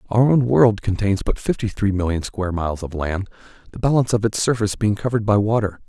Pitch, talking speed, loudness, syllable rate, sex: 105 Hz, 215 wpm, -20 LUFS, 6.4 syllables/s, male